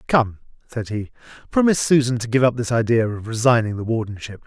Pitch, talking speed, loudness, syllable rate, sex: 115 Hz, 190 wpm, -20 LUFS, 6.1 syllables/s, male